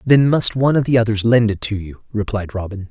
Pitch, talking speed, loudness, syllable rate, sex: 110 Hz, 250 wpm, -17 LUFS, 5.8 syllables/s, male